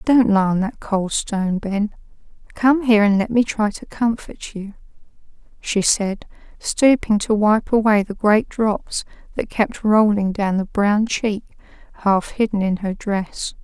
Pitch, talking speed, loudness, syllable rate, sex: 210 Hz, 165 wpm, -19 LUFS, 4.0 syllables/s, female